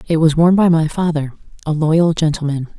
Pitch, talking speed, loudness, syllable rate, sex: 160 Hz, 195 wpm, -15 LUFS, 5.2 syllables/s, female